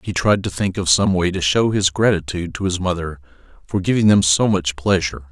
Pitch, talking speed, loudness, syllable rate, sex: 90 Hz, 225 wpm, -18 LUFS, 5.7 syllables/s, male